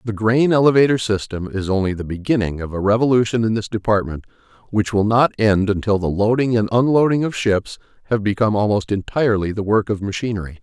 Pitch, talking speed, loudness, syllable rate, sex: 110 Hz, 185 wpm, -18 LUFS, 6.0 syllables/s, male